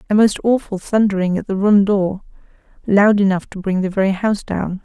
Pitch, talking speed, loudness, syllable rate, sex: 200 Hz, 185 wpm, -17 LUFS, 5.5 syllables/s, female